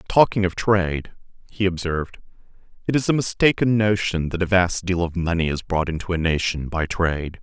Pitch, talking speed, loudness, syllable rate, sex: 90 Hz, 185 wpm, -21 LUFS, 5.5 syllables/s, male